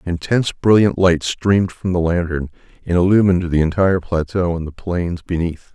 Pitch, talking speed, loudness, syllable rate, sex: 90 Hz, 175 wpm, -17 LUFS, 5.5 syllables/s, male